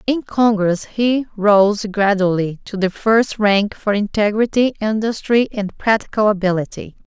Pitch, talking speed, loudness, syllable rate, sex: 210 Hz, 125 wpm, -17 LUFS, 4.3 syllables/s, female